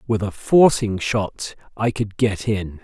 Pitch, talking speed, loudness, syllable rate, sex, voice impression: 105 Hz, 170 wpm, -20 LUFS, 3.7 syllables/s, male, masculine, adult-like, slightly thick, slightly clear, sincere